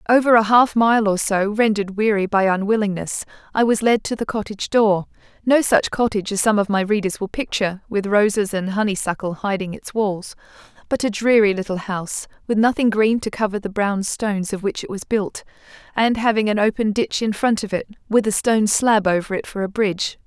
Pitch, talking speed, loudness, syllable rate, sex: 210 Hz, 205 wpm, -19 LUFS, 5.6 syllables/s, female